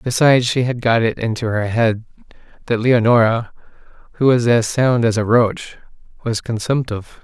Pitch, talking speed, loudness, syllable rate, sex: 115 Hz, 160 wpm, -17 LUFS, 5.0 syllables/s, male